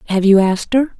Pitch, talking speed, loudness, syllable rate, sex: 215 Hz, 240 wpm, -14 LUFS, 6.5 syllables/s, female